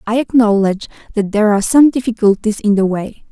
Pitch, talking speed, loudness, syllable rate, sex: 220 Hz, 180 wpm, -14 LUFS, 6.3 syllables/s, female